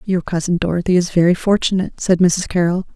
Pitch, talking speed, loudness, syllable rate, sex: 180 Hz, 185 wpm, -17 LUFS, 6.2 syllables/s, female